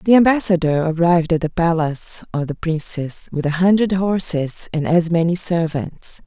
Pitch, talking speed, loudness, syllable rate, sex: 170 Hz, 165 wpm, -18 LUFS, 4.8 syllables/s, female